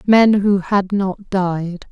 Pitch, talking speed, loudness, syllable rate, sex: 195 Hz, 155 wpm, -17 LUFS, 2.9 syllables/s, female